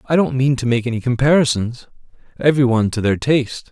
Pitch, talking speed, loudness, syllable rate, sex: 125 Hz, 195 wpm, -17 LUFS, 6.4 syllables/s, male